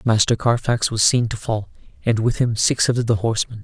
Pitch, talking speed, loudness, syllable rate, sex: 115 Hz, 215 wpm, -19 LUFS, 5.4 syllables/s, male